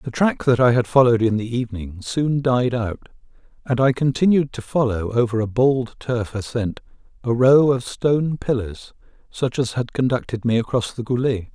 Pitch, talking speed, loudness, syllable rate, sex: 120 Hz, 180 wpm, -20 LUFS, 5.1 syllables/s, male